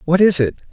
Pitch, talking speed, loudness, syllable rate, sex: 165 Hz, 250 wpm, -15 LUFS, 6.1 syllables/s, male